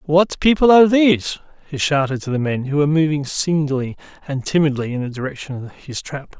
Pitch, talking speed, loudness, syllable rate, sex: 150 Hz, 195 wpm, -18 LUFS, 5.7 syllables/s, male